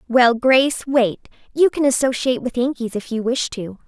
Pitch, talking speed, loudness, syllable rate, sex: 245 Hz, 185 wpm, -18 LUFS, 5.4 syllables/s, female